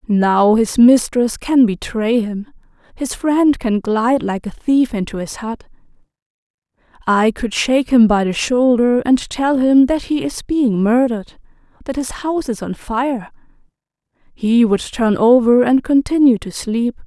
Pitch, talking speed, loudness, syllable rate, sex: 240 Hz, 160 wpm, -16 LUFS, 4.2 syllables/s, female